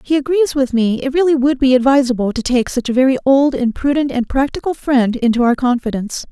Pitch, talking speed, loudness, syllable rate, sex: 260 Hz, 220 wpm, -15 LUFS, 6.1 syllables/s, female